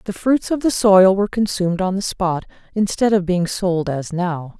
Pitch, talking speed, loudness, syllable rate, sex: 190 Hz, 210 wpm, -18 LUFS, 4.8 syllables/s, female